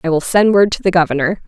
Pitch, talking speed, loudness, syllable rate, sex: 175 Hz, 285 wpm, -14 LUFS, 6.6 syllables/s, female